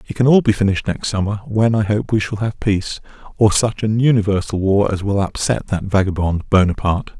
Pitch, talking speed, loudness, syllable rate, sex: 105 Hz, 210 wpm, -17 LUFS, 5.8 syllables/s, male